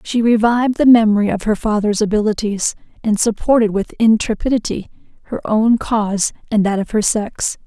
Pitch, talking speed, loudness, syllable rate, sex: 220 Hz, 155 wpm, -16 LUFS, 5.3 syllables/s, female